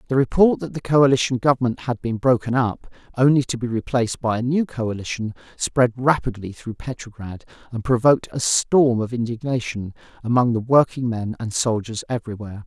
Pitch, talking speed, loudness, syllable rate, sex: 120 Hz, 160 wpm, -21 LUFS, 5.7 syllables/s, male